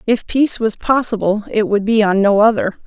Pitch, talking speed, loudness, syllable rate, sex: 215 Hz, 210 wpm, -15 LUFS, 5.3 syllables/s, female